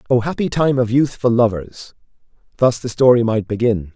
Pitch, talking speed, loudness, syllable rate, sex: 120 Hz, 165 wpm, -17 LUFS, 3.9 syllables/s, male